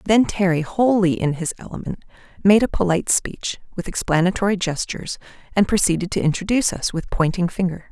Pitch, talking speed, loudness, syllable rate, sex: 185 Hz, 160 wpm, -20 LUFS, 5.8 syllables/s, female